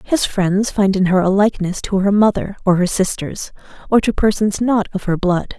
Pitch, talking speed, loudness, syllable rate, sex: 195 Hz, 215 wpm, -17 LUFS, 5.0 syllables/s, female